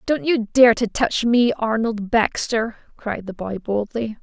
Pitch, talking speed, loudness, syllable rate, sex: 225 Hz, 170 wpm, -20 LUFS, 3.9 syllables/s, female